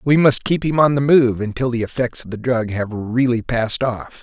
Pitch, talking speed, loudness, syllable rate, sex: 125 Hz, 240 wpm, -18 LUFS, 5.1 syllables/s, male